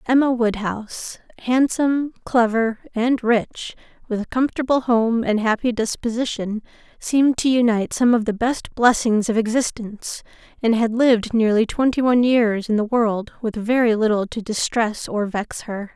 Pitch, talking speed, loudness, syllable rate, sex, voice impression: 230 Hz, 155 wpm, -20 LUFS, 4.9 syllables/s, female, very feminine, slightly adult-like, clear, slightly cute, refreshing, friendly, slightly lively